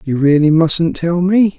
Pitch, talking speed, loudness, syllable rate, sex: 165 Hz, 190 wpm, -13 LUFS, 4.0 syllables/s, male